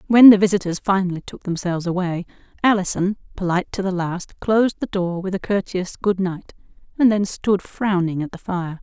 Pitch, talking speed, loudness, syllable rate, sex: 190 Hz, 185 wpm, -20 LUFS, 5.5 syllables/s, female